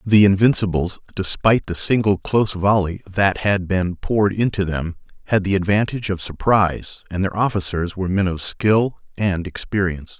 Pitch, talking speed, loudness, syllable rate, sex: 95 Hz, 160 wpm, -19 LUFS, 5.2 syllables/s, male